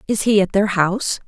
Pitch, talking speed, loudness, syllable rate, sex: 200 Hz, 235 wpm, -17 LUFS, 5.7 syllables/s, female